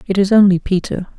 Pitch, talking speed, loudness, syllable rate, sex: 195 Hz, 205 wpm, -14 LUFS, 6.1 syllables/s, female